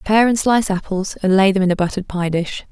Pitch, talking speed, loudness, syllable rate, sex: 195 Hz, 265 wpm, -17 LUFS, 6.2 syllables/s, female